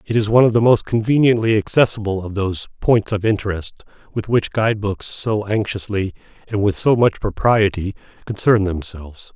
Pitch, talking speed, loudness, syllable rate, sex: 105 Hz, 165 wpm, -18 LUFS, 5.4 syllables/s, male